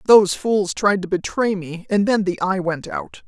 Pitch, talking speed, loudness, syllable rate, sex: 195 Hz, 220 wpm, -20 LUFS, 4.6 syllables/s, female